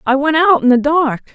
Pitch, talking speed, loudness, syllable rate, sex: 285 Hz, 270 wpm, -13 LUFS, 5.4 syllables/s, female